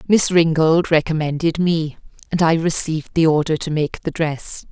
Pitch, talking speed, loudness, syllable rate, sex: 160 Hz, 165 wpm, -18 LUFS, 4.8 syllables/s, female